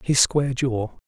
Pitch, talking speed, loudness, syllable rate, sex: 125 Hz, 165 wpm, -22 LUFS, 4.8 syllables/s, male